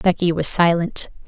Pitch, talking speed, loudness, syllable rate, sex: 170 Hz, 140 wpm, -17 LUFS, 4.6 syllables/s, female